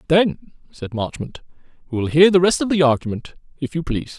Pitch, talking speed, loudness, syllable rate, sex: 155 Hz, 200 wpm, -19 LUFS, 5.7 syllables/s, male